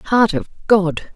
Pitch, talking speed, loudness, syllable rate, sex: 190 Hz, 155 wpm, -17 LUFS, 3.2 syllables/s, female